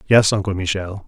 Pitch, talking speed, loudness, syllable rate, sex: 95 Hz, 165 wpm, -19 LUFS, 5.8 syllables/s, male